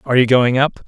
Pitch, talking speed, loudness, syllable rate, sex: 125 Hz, 275 wpm, -14 LUFS, 7.8 syllables/s, male